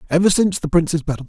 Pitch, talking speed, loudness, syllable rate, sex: 165 Hz, 235 wpm, -18 LUFS, 8.0 syllables/s, male